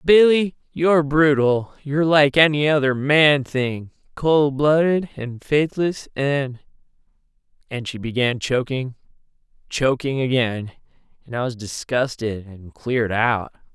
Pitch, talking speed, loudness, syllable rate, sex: 135 Hz, 100 wpm, -20 LUFS, 4.0 syllables/s, male